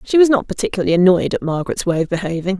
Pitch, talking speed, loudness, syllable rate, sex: 190 Hz, 230 wpm, -17 LUFS, 7.6 syllables/s, female